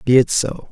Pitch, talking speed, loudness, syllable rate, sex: 120 Hz, 250 wpm, -17 LUFS, 5.0 syllables/s, male